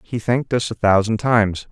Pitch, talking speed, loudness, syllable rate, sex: 110 Hz, 210 wpm, -18 LUFS, 5.6 syllables/s, male